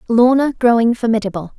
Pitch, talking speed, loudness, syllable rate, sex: 230 Hz, 115 wpm, -15 LUFS, 6.0 syllables/s, female